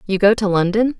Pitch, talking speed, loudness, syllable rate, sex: 205 Hz, 240 wpm, -16 LUFS, 6.0 syllables/s, female